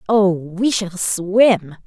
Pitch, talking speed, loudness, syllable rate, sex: 195 Hz, 130 wpm, -17 LUFS, 2.5 syllables/s, female